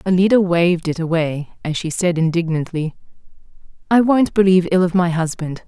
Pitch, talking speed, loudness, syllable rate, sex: 175 Hz, 160 wpm, -17 LUFS, 5.6 syllables/s, female